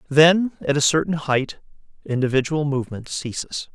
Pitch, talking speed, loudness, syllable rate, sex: 145 Hz, 130 wpm, -21 LUFS, 4.8 syllables/s, male